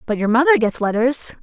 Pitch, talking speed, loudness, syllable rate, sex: 245 Hz, 210 wpm, -17 LUFS, 6.3 syllables/s, female